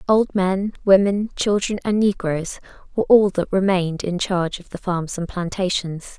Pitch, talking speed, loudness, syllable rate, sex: 190 Hz, 165 wpm, -20 LUFS, 4.8 syllables/s, female